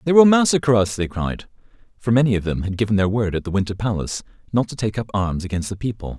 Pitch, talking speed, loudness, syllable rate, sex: 105 Hz, 250 wpm, -20 LUFS, 6.6 syllables/s, male